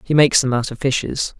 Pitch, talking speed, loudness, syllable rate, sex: 130 Hz, 260 wpm, -18 LUFS, 6.4 syllables/s, male